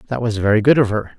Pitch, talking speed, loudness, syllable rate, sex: 110 Hz, 305 wpm, -16 LUFS, 7.5 syllables/s, male